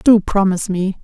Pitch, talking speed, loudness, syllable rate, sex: 195 Hz, 175 wpm, -16 LUFS, 5.1 syllables/s, female